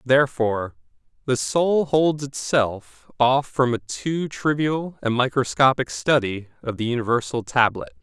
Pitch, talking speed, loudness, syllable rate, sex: 130 Hz, 125 wpm, -22 LUFS, 4.2 syllables/s, male